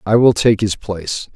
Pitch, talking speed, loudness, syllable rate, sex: 105 Hz, 220 wpm, -16 LUFS, 5.0 syllables/s, male